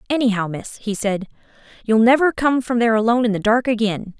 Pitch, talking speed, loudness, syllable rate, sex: 225 Hz, 200 wpm, -18 LUFS, 6.2 syllables/s, female